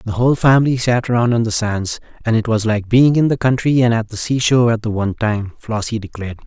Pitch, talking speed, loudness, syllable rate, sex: 115 Hz, 240 wpm, -16 LUFS, 6.2 syllables/s, male